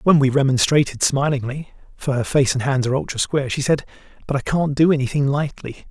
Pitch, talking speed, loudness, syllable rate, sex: 140 Hz, 185 wpm, -19 LUFS, 6.1 syllables/s, male